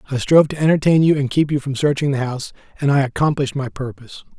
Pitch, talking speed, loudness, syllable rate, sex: 140 Hz, 235 wpm, -18 LUFS, 7.1 syllables/s, male